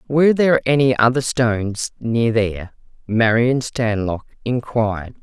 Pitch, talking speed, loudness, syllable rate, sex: 120 Hz, 115 wpm, -18 LUFS, 4.5 syllables/s, female